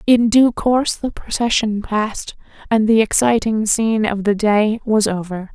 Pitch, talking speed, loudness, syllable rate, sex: 220 Hz, 160 wpm, -17 LUFS, 4.6 syllables/s, female